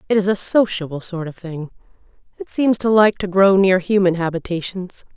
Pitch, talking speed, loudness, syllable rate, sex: 190 Hz, 185 wpm, -18 LUFS, 5.2 syllables/s, female